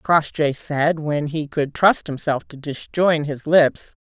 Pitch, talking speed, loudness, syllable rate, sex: 155 Hz, 165 wpm, -20 LUFS, 3.6 syllables/s, female